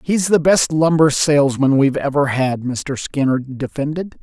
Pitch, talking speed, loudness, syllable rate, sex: 145 Hz, 155 wpm, -17 LUFS, 4.7 syllables/s, male